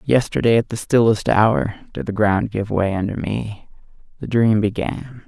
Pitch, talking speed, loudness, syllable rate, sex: 110 Hz, 170 wpm, -19 LUFS, 4.5 syllables/s, male